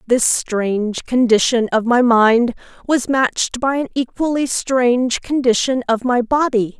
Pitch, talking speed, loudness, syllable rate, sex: 245 Hz, 140 wpm, -16 LUFS, 4.2 syllables/s, female